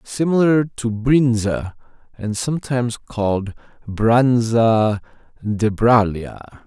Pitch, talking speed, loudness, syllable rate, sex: 115 Hz, 80 wpm, -18 LUFS, 3.5 syllables/s, male